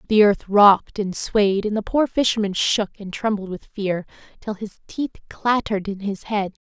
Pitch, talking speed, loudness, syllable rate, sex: 205 Hz, 190 wpm, -21 LUFS, 4.8 syllables/s, female